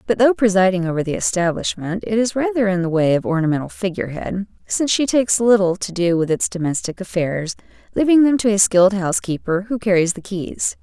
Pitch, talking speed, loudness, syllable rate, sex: 195 Hz, 200 wpm, -18 LUFS, 6.0 syllables/s, female